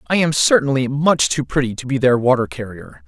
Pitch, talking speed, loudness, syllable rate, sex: 135 Hz, 215 wpm, -17 LUFS, 5.5 syllables/s, male